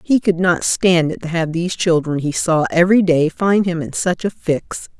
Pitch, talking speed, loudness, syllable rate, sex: 170 Hz, 230 wpm, -17 LUFS, 4.8 syllables/s, female